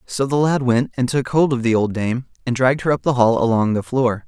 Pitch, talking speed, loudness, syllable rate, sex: 125 Hz, 280 wpm, -18 LUFS, 5.6 syllables/s, male